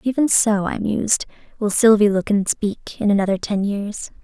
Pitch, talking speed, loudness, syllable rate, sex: 210 Hz, 185 wpm, -19 LUFS, 4.8 syllables/s, female